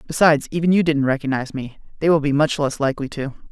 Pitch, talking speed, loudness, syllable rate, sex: 145 Hz, 220 wpm, -19 LUFS, 7.0 syllables/s, male